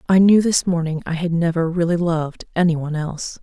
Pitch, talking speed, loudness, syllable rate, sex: 170 Hz, 195 wpm, -19 LUFS, 5.8 syllables/s, female